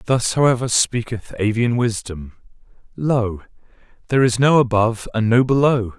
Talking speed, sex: 120 wpm, male